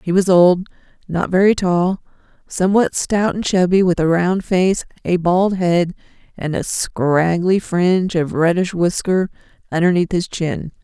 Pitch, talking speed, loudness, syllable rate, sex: 180 Hz, 150 wpm, -17 LUFS, 4.2 syllables/s, female